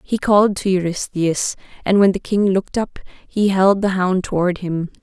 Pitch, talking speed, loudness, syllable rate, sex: 190 Hz, 190 wpm, -18 LUFS, 4.8 syllables/s, female